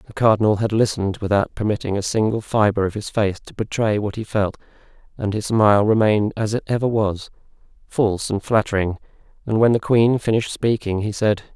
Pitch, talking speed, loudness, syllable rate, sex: 105 Hz, 180 wpm, -20 LUFS, 5.9 syllables/s, male